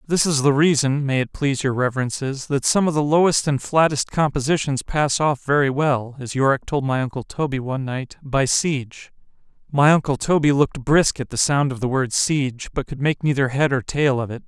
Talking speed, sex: 205 wpm, male